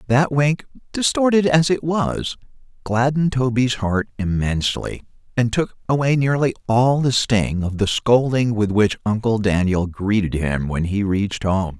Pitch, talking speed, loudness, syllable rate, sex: 115 Hz, 155 wpm, -19 LUFS, 4.5 syllables/s, male